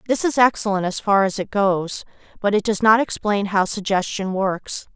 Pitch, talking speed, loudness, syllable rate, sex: 205 Hz, 195 wpm, -20 LUFS, 4.8 syllables/s, female